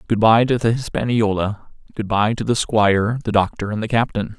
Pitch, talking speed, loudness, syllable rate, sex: 110 Hz, 205 wpm, -19 LUFS, 5.3 syllables/s, male